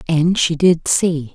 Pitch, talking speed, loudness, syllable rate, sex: 165 Hz, 180 wpm, -16 LUFS, 3.4 syllables/s, female